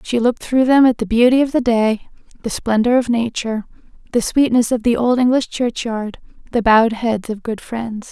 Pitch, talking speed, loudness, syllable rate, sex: 235 Hz, 200 wpm, -17 LUFS, 5.2 syllables/s, female